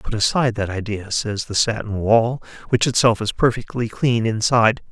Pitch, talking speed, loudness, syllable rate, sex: 115 Hz, 170 wpm, -19 LUFS, 5.1 syllables/s, male